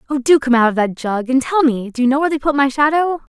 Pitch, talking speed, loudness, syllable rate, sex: 270 Hz, 320 wpm, -16 LUFS, 6.6 syllables/s, female